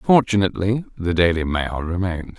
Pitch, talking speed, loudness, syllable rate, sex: 95 Hz, 125 wpm, -20 LUFS, 5.5 syllables/s, male